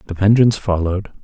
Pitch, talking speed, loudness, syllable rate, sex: 100 Hz, 145 wpm, -16 LUFS, 7.2 syllables/s, male